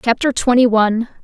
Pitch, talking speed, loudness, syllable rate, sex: 240 Hz, 145 wpm, -15 LUFS, 5.9 syllables/s, female